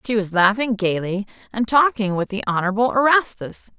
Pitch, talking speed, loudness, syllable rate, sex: 215 Hz, 160 wpm, -19 LUFS, 5.5 syllables/s, female